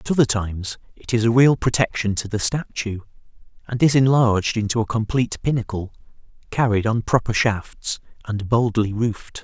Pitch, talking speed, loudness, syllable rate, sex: 115 Hz, 160 wpm, -21 LUFS, 5.3 syllables/s, male